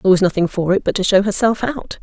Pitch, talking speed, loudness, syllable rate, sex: 195 Hz, 295 wpm, -17 LUFS, 6.5 syllables/s, female